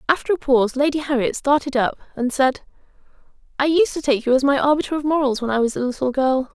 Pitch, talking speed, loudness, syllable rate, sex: 270 Hz, 220 wpm, -20 LUFS, 6.5 syllables/s, female